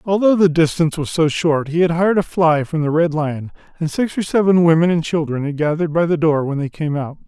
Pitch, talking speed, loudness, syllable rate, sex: 160 Hz, 255 wpm, -17 LUFS, 5.9 syllables/s, male